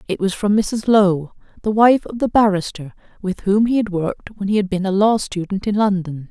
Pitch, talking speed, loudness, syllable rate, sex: 200 Hz, 230 wpm, -18 LUFS, 5.2 syllables/s, female